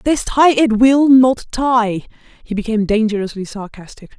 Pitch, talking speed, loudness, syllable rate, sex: 230 Hz, 145 wpm, -14 LUFS, 4.7 syllables/s, female